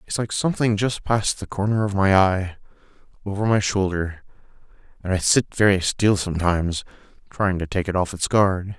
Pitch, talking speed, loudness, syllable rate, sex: 100 Hz, 180 wpm, -21 LUFS, 5.2 syllables/s, male